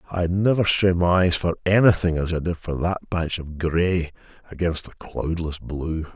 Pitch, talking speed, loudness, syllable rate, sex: 85 Hz, 185 wpm, -22 LUFS, 4.8 syllables/s, male